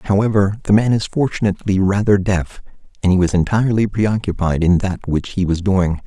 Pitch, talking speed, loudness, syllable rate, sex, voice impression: 100 Hz, 180 wpm, -17 LUFS, 5.6 syllables/s, male, masculine, slightly old, powerful, slightly soft, slightly muffled, slightly halting, sincere, mature, friendly, wild, kind, modest